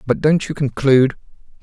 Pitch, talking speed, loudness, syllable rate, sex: 140 Hz, 150 wpm, -17 LUFS, 6.1 syllables/s, male